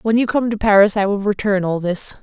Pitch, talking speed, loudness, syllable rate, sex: 205 Hz, 270 wpm, -17 LUFS, 5.6 syllables/s, female